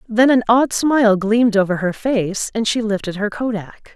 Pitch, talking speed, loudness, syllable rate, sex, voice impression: 220 Hz, 195 wpm, -17 LUFS, 4.8 syllables/s, female, very feminine, adult-like, slightly middle-aged, thin, tensed, slightly powerful, bright, hard, very clear, very fluent, cool, slightly intellectual, slightly refreshing, sincere, slightly calm, slightly friendly, slightly reassuring, unique, elegant, slightly wild, slightly sweet, lively, strict, slightly intense, sharp